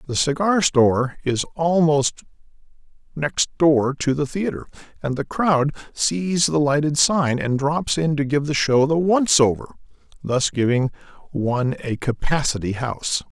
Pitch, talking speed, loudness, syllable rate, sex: 145 Hz, 150 wpm, -20 LUFS, 4.3 syllables/s, male